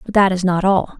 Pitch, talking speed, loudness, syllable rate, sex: 190 Hz, 305 wpm, -16 LUFS, 5.8 syllables/s, female